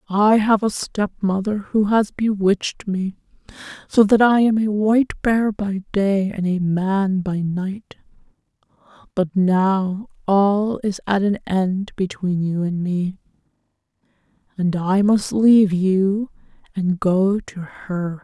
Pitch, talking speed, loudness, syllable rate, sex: 195 Hz, 140 wpm, -19 LUFS, 3.5 syllables/s, female